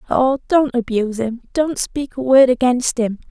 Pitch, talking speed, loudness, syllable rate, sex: 250 Hz, 180 wpm, -17 LUFS, 4.6 syllables/s, female